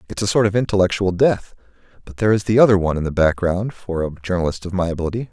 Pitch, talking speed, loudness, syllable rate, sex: 95 Hz, 235 wpm, -19 LUFS, 7.3 syllables/s, male